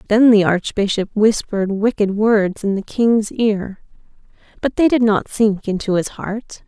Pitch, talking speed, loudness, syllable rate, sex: 210 Hz, 160 wpm, -17 LUFS, 4.3 syllables/s, female